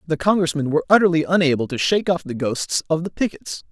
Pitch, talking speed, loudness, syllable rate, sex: 160 Hz, 210 wpm, -20 LUFS, 6.4 syllables/s, male